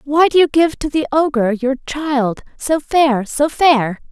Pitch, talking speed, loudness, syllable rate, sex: 280 Hz, 190 wpm, -15 LUFS, 3.9 syllables/s, female